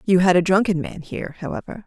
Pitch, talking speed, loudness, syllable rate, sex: 175 Hz, 225 wpm, -21 LUFS, 6.6 syllables/s, female